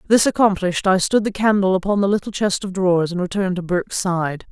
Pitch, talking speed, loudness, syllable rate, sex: 190 Hz, 225 wpm, -19 LUFS, 6.3 syllables/s, female